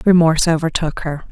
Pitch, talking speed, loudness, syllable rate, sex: 165 Hz, 135 wpm, -16 LUFS, 6.0 syllables/s, female